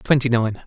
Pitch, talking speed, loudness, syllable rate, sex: 120 Hz, 270 wpm, -19 LUFS, 6.6 syllables/s, male